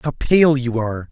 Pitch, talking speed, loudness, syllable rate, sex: 130 Hz, 215 wpm, -17 LUFS, 5.6 syllables/s, male